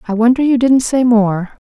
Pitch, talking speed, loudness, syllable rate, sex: 235 Hz, 215 wpm, -13 LUFS, 4.9 syllables/s, female